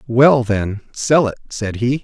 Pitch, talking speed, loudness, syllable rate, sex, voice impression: 120 Hz, 175 wpm, -17 LUFS, 3.7 syllables/s, male, very masculine, very adult-like, very middle-aged, very thick, tensed, powerful, slightly dark, hard, clear, very fluent, cool, very intellectual, sincere, calm, very mature, friendly, very reassuring, unique, slightly elegant, very wild, slightly sweet, slightly lively, kind